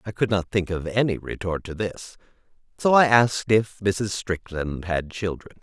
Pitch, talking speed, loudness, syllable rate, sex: 100 Hz, 180 wpm, -23 LUFS, 4.6 syllables/s, male